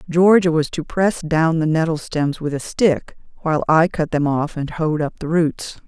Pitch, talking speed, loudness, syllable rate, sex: 160 Hz, 215 wpm, -19 LUFS, 4.6 syllables/s, female